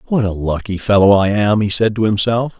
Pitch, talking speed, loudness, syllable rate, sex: 105 Hz, 230 wpm, -15 LUFS, 5.4 syllables/s, male